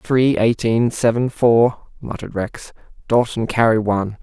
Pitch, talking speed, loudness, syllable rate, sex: 115 Hz, 140 wpm, -18 LUFS, 4.4 syllables/s, male